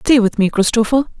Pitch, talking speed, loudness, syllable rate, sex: 230 Hz, 200 wpm, -15 LUFS, 5.5 syllables/s, female